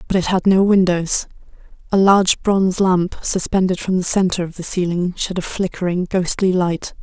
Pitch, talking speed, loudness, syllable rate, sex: 185 Hz, 170 wpm, -17 LUFS, 5.1 syllables/s, female